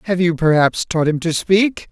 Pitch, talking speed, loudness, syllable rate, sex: 170 Hz, 220 wpm, -16 LUFS, 4.6 syllables/s, male